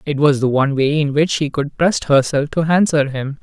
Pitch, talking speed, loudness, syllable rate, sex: 145 Hz, 245 wpm, -16 LUFS, 5.3 syllables/s, male